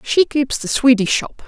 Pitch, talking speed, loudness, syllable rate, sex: 260 Hz, 205 wpm, -16 LUFS, 4.4 syllables/s, female